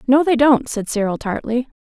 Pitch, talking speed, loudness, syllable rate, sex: 250 Hz, 195 wpm, -18 LUFS, 5.1 syllables/s, female